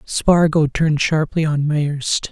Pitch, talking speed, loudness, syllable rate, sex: 155 Hz, 130 wpm, -17 LUFS, 3.6 syllables/s, male